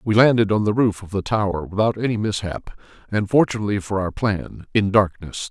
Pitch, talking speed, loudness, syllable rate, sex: 105 Hz, 195 wpm, -21 LUFS, 5.6 syllables/s, male